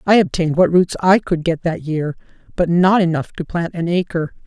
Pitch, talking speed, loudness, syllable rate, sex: 170 Hz, 215 wpm, -17 LUFS, 5.3 syllables/s, female